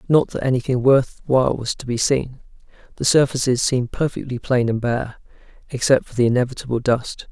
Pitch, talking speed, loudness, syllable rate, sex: 125 Hz, 170 wpm, -20 LUFS, 5.7 syllables/s, male